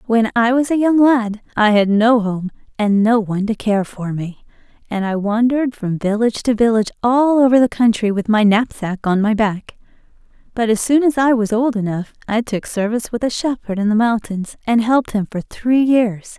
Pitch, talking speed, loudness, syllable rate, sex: 225 Hz, 210 wpm, -17 LUFS, 5.2 syllables/s, female